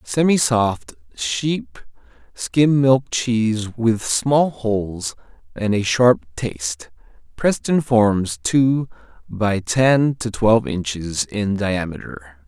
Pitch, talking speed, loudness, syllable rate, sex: 110 Hz, 110 wpm, -19 LUFS, 3.2 syllables/s, male